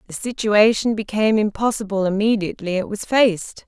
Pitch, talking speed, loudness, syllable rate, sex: 210 Hz, 130 wpm, -19 LUFS, 5.7 syllables/s, female